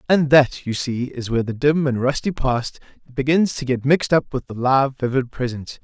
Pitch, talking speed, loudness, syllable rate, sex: 130 Hz, 215 wpm, -20 LUFS, 5.1 syllables/s, male